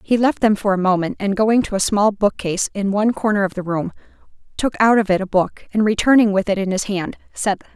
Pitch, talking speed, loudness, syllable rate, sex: 205 Hz, 250 wpm, -18 LUFS, 5.9 syllables/s, female